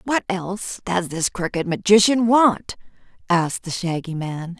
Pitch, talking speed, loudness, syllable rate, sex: 190 Hz, 155 wpm, -20 LUFS, 4.6 syllables/s, female